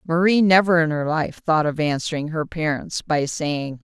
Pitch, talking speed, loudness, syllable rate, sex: 160 Hz, 185 wpm, -21 LUFS, 4.6 syllables/s, female